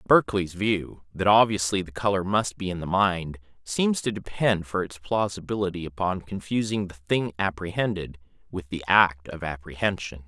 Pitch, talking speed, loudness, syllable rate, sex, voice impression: 95 Hz, 160 wpm, -25 LUFS, 4.9 syllables/s, male, very masculine, very middle-aged, thick, tensed, powerful, slightly bright, soft, slightly muffled, fluent, slightly raspy, cool, intellectual, refreshing, slightly sincere, calm, mature, friendly, reassuring, unique, slightly elegant, wild, slightly sweet, lively, kind, slightly modest